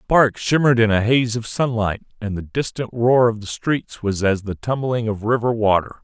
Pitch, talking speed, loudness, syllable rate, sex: 115 Hz, 220 wpm, -20 LUFS, 5.2 syllables/s, male